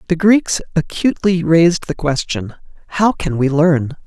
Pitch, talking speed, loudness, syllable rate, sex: 165 Hz, 150 wpm, -16 LUFS, 4.6 syllables/s, male